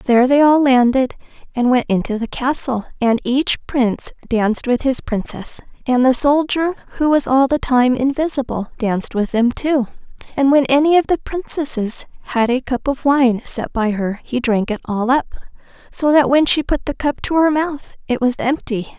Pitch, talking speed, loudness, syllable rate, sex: 260 Hz, 195 wpm, -17 LUFS, 4.8 syllables/s, female